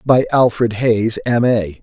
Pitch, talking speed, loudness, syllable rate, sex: 115 Hz, 165 wpm, -15 LUFS, 3.7 syllables/s, male